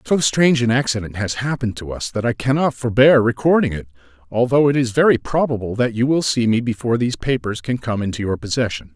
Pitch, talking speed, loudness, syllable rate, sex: 120 Hz, 215 wpm, -18 LUFS, 6.2 syllables/s, male